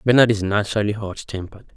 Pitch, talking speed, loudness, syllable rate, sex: 105 Hz, 170 wpm, -21 LUFS, 7.1 syllables/s, male